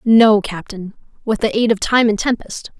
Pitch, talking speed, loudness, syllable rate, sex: 215 Hz, 195 wpm, -16 LUFS, 4.7 syllables/s, female